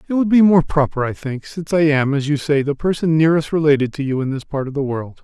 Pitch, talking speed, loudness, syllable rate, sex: 150 Hz, 285 wpm, -18 LUFS, 6.3 syllables/s, male